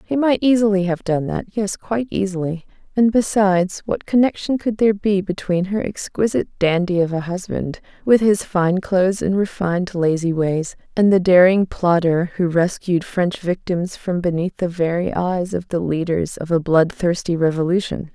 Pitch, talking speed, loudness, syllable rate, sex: 185 Hz, 170 wpm, -19 LUFS, 4.9 syllables/s, female